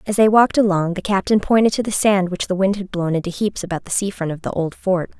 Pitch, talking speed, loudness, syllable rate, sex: 190 Hz, 290 wpm, -19 LUFS, 6.2 syllables/s, female